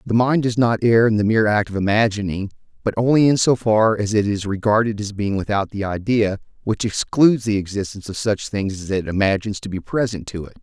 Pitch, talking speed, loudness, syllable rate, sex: 105 Hz, 225 wpm, -19 LUFS, 5.9 syllables/s, male